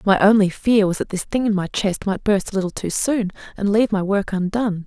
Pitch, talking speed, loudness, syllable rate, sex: 200 Hz, 260 wpm, -20 LUFS, 5.8 syllables/s, female